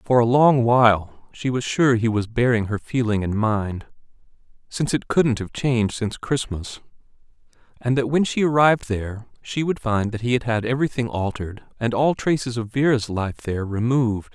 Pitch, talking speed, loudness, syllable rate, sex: 120 Hz, 185 wpm, -21 LUFS, 5.3 syllables/s, male